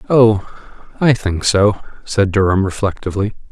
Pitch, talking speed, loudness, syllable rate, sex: 100 Hz, 120 wpm, -16 LUFS, 4.8 syllables/s, male